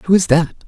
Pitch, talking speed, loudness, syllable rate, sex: 175 Hz, 265 wpm, -15 LUFS, 5.6 syllables/s, male